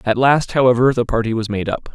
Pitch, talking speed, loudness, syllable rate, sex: 120 Hz, 245 wpm, -17 LUFS, 6.0 syllables/s, male